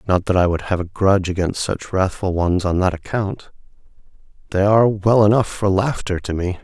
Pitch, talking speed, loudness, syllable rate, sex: 95 Hz, 200 wpm, -18 LUFS, 5.3 syllables/s, male